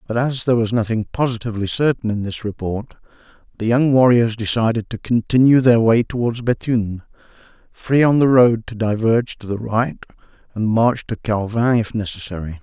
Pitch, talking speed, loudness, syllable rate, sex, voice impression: 115 Hz, 165 wpm, -18 LUFS, 5.4 syllables/s, male, very masculine, old, slightly thick, sincere, calm